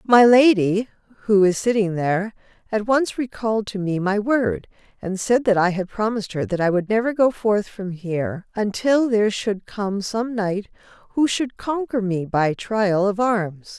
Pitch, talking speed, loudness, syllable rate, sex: 210 Hz, 185 wpm, -21 LUFS, 4.5 syllables/s, female